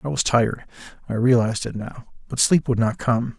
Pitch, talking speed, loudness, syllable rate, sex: 120 Hz, 215 wpm, -21 LUFS, 5.5 syllables/s, male